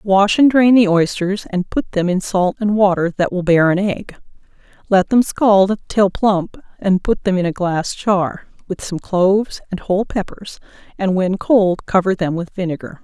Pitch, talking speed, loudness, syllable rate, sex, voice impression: 190 Hz, 195 wpm, -16 LUFS, 4.4 syllables/s, female, feminine, adult-like, tensed, slightly soft, slightly halting, calm, friendly, slightly reassuring, elegant, lively, slightly sharp